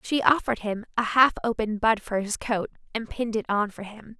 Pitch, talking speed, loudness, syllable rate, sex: 220 Hz, 230 wpm, -25 LUFS, 5.9 syllables/s, female